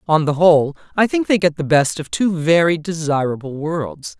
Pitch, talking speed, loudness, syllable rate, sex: 160 Hz, 200 wpm, -17 LUFS, 5.0 syllables/s, male